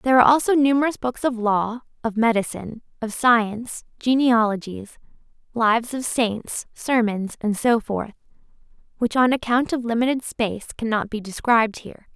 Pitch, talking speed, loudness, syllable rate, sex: 235 Hz, 145 wpm, -21 LUFS, 5.1 syllables/s, female